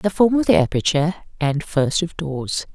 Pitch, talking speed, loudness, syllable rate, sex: 165 Hz, 195 wpm, -20 LUFS, 5.0 syllables/s, female